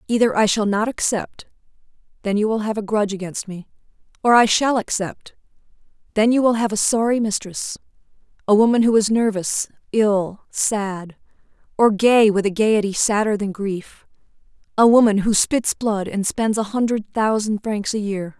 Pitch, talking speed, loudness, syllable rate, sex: 210 Hz, 170 wpm, -19 LUFS, 4.8 syllables/s, female